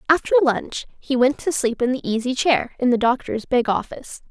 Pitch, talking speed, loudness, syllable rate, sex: 260 Hz, 210 wpm, -20 LUFS, 5.2 syllables/s, female